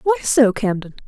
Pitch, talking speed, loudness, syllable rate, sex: 235 Hz, 165 wpm, -18 LUFS, 4.9 syllables/s, female